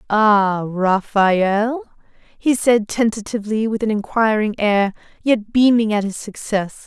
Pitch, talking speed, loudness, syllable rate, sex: 215 Hz, 120 wpm, -18 LUFS, 3.8 syllables/s, female